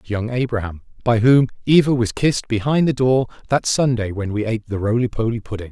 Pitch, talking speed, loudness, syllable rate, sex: 120 Hz, 220 wpm, -19 LUFS, 6.1 syllables/s, male